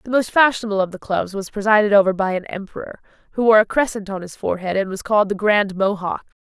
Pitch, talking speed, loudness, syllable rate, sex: 205 Hz, 235 wpm, -19 LUFS, 6.5 syllables/s, female